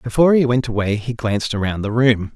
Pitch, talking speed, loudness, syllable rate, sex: 115 Hz, 230 wpm, -18 LUFS, 6.1 syllables/s, male